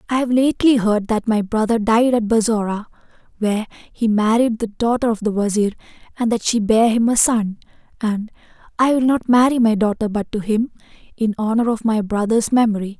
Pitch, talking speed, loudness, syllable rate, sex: 225 Hz, 190 wpm, -18 LUFS, 5.4 syllables/s, female